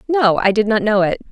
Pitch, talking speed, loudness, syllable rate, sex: 220 Hz, 275 wpm, -15 LUFS, 5.8 syllables/s, female